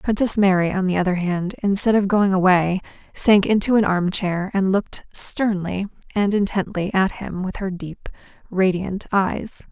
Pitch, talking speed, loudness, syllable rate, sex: 190 Hz, 160 wpm, -20 LUFS, 4.5 syllables/s, female